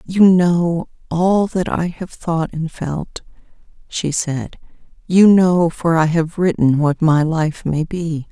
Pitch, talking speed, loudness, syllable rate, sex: 170 Hz, 145 wpm, -17 LUFS, 3.4 syllables/s, female